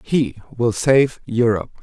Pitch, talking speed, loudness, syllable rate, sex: 120 Hz, 130 wpm, -19 LUFS, 4.1 syllables/s, male